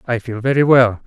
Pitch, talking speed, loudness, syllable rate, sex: 120 Hz, 225 wpm, -15 LUFS, 5.4 syllables/s, male